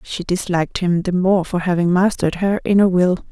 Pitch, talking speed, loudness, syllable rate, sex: 180 Hz, 200 wpm, -17 LUFS, 5.4 syllables/s, female